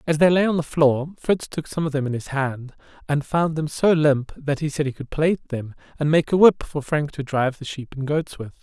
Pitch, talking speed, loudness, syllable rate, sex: 150 Hz, 270 wpm, -22 LUFS, 5.2 syllables/s, male